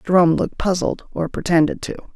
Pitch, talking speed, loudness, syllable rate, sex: 175 Hz, 165 wpm, -19 LUFS, 6.7 syllables/s, female